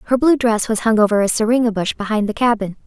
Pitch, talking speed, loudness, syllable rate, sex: 220 Hz, 250 wpm, -17 LUFS, 6.2 syllables/s, female